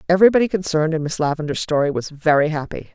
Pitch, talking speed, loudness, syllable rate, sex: 160 Hz, 185 wpm, -19 LUFS, 7.3 syllables/s, female